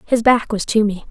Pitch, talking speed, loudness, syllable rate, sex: 220 Hz, 270 wpm, -17 LUFS, 5.3 syllables/s, female